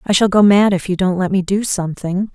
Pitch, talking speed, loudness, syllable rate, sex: 190 Hz, 280 wpm, -15 LUFS, 5.8 syllables/s, female